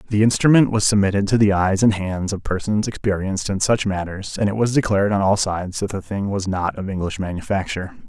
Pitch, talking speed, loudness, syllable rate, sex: 100 Hz, 225 wpm, -20 LUFS, 6.0 syllables/s, male